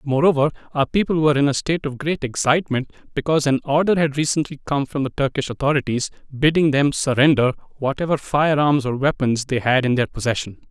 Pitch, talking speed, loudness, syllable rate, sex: 140 Hz, 185 wpm, -20 LUFS, 6.1 syllables/s, male